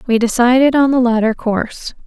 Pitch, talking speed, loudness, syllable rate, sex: 240 Hz, 175 wpm, -14 LUFS, 5.4 syllables/s, female